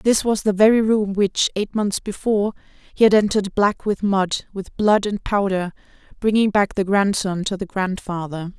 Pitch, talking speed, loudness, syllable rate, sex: 200 Hz, 180 wpm, -20 LUFS, 4.8 syllables/s, female